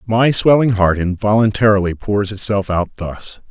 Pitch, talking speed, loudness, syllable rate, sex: 105 Hz, 135 wpm, -15 LUFS, 4.7 syllables/s, male